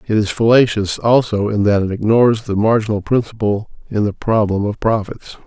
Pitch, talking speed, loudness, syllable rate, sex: 105 Hz, 175 wpm, -16 LUFS, 5.4 syllables/s, male